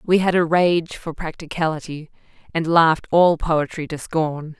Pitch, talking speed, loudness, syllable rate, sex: 160 Hz, 155 wpm, -20 LUFS, 4.4 syllables/s, female